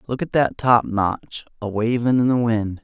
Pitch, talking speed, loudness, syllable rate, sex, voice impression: 115 Hz, 190 wpm, -20 LUFS, 4.4 syllables/s, male, masculine, adult-like, tensed, powerful, clear, slightly nasal, slightly refreshing, calm, friendly, reassuring, slightly wild, slightly lively, kind, slightly modest